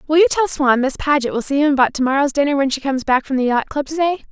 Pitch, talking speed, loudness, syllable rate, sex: 280 Hz, 320 wpm, -17 LUFS, 6.9 syllables/s, female